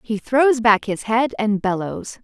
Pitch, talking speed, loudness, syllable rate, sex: 225 Hz, 190 wpm, -19 LUFS, 3.9 syllables/s, female